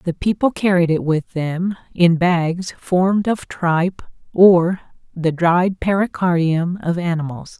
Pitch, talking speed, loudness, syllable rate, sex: 175 Hz, 135 wpm, -18 LUFS, 3.9 syllables/s, female